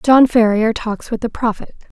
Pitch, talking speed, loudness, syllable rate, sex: 230 Hz, 180 wpm, -16 LUFS, 4.6 syllables/s, female